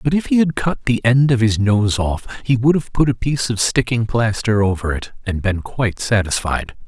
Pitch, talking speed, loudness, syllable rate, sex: 115 Hz, 225 wpm, -18 LUFS, 5.1 syllables/s, male